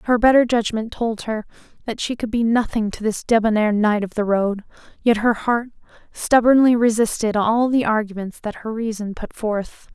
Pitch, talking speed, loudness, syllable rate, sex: 225 Hz, 180 wpm, -19 LUFS, 4.9 syllables/s, female